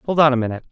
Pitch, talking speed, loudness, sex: 135 Hz, 335 wpm, -17 LUFS, male